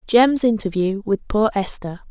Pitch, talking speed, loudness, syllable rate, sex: 210 Hz, 140 wpm, -20 LUFS, 4.4 syllables/s, female